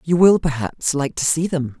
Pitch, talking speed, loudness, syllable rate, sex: 150 Hz, 235 wpm, -19 LUFS, 4.7 syllables/s, female